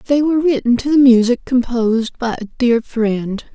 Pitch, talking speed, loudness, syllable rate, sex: 245 Hz, 185 wpm, -15 LUFS, 5.0 syllables/s, female